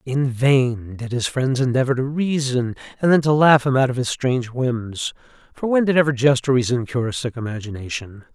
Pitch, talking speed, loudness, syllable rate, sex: 130 Hz, 210 wpm, -20 LUFS, 5.2 syllables/s, male